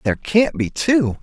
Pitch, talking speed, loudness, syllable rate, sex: 140 Hz, 195 wpm, -18 LUFS, 4.6 syllables/s, male